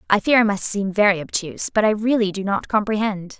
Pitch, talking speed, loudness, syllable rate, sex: 205 Hz, 230 wpm, -20 LUFS, 6.0 syllables/s, female